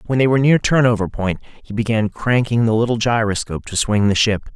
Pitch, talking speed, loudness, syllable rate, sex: 115 Hz, 210 wpm, -17 LUFS, 6.0 syllables/s, male